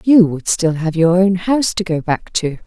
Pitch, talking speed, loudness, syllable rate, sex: 180 Hz, 250 wpm, -16 LUFS, 4.8 syllables/s, female